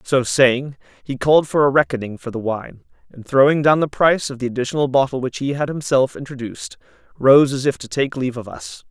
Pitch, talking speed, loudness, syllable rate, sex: 135 Hz, 215 wpm, -18 LUFS, 5.9 syllables/s, male